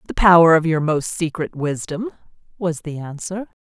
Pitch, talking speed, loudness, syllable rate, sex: 165 Hz, 165 wpm, -19 LUFS, 4.9 syllables/s, female